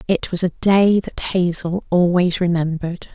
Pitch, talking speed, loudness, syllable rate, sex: 180 Hz, 155 wpm, -18 LUFS, 4.7 syllables/s, female